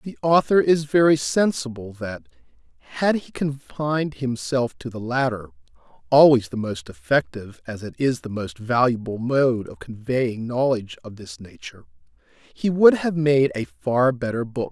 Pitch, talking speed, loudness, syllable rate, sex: 125 Hz, 155 wpm, -21 LUFS, 4.6 syllables/s, male